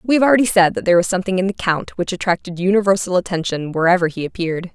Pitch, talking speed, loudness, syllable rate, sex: 185 Hz, 230 wpm, -17 LUFS, 7.2 syllables/s, female